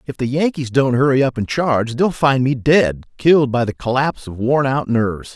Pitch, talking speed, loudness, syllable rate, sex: 130 Hz, 225 wpm, -17 LUFS, 5.3 syllables/s, male